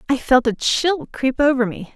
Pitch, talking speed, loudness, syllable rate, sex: 260 Hz, 215 wpm, -18 LUFS, 4.7 syllables/s, female